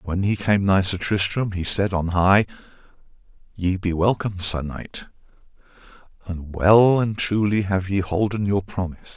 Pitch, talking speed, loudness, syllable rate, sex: 95 Hz, 155 wpm, -21 LUFS, 4.6 syllables/s, male